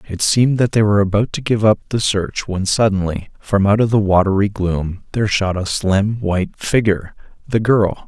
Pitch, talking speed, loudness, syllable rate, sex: 105 Hz, 195 wpm, -17 LUFS, 5.3 syllables/s, male